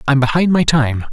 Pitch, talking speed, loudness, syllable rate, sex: 140 Hz, 270 wpm, -14 LUFS, 6.3 syllables/s, male